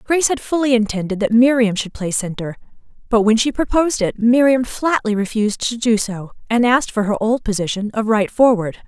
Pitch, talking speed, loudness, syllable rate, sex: 225 Hz, 195 wpm, -17 LUFS, 5.7 syllables/s, female